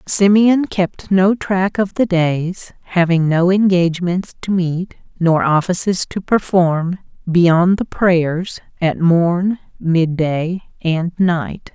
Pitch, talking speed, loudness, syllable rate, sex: 180 Hz, 125 wpm, -16 LUFS, 3.2 syllables/s, female